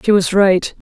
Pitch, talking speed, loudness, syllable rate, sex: 195 Hz, 205 wpm, -14 LUFS, 4.4 syllables/s, female